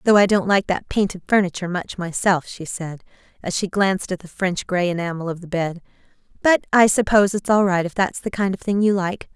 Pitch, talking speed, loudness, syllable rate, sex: 190 Hz, 230 wpm, -20 LUFS, 5.7 syllables/s, female